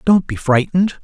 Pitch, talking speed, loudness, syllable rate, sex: 160 Hz, 175 wpm, -16 LUFS, 5.8 syllables/s, male